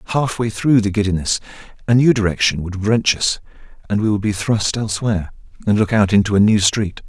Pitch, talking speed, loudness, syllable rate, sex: 105 Hz, 195 wpm, -17 LUFS, 5.7 syllables/s, male